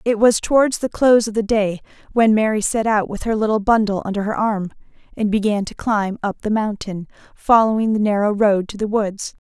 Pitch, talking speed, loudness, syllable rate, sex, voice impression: 215 Hz, 210 wpm, -18 LUFS, 5.3 syllables/s, female, very feminine, slightly young, slightly adult-like, thin, slightly tensed, slightly weak, slightly bright, slightly hard, clear, slightly halting, cute, slightly intellectual, refreshing, very sincere, calm, friendly, reassuring, slightly unique, elegant, sweet, slightly lively, kind, slightly modest